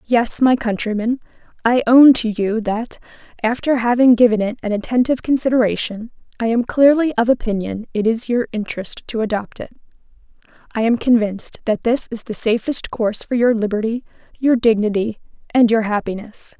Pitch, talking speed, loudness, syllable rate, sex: 230 Hz, 160 wpm, -18 LUFS, 5.3 syllables/s, female